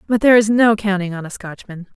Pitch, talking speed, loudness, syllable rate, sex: 200 Hz, 240 wpm, -15 LUFS, 6.2 syllables/s, female